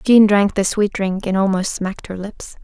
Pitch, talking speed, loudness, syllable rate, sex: 200 Hz, 230 wpm, -17 LUFS, 4.8 syllables/s, female